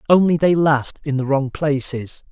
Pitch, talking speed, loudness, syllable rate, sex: 145 Hz, 180 wpm, -18 LUFS, 4.9 syllables/s, male